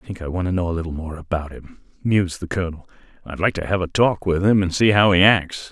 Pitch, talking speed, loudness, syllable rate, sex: 90 Hz, 285 wpm, -20 LUFS, 6.4 syllables/s, male